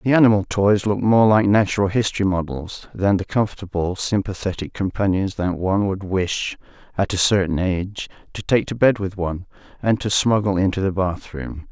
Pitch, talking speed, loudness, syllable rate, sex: 100 Hz, 180 wpm, -20 LUFS, 5.4 syllables/s, male